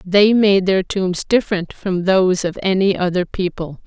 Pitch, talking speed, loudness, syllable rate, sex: 190 Hz, 170 wpm, -17 LUFS, 4.6 syllables/s, female